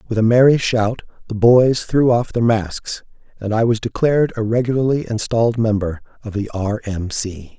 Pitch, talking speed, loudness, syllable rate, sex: 115 Hz, 180 wpm, -17 LUFS, 5.0 syllables/s, male